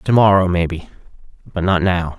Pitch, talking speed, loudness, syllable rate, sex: 90 Hz, 135 wpm, -16 LUFS, 5.5 syllables/s, male